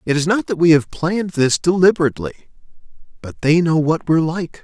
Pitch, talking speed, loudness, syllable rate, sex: 160 Hz, 195 wpm, -16 LUFS, 6.1 syllables/s, male